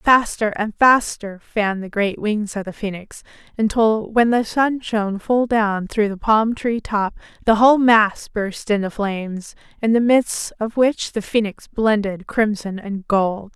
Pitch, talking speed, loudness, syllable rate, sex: 215 Hz, 175 wpm, -19 LUFS, 4.1 syllables/s, female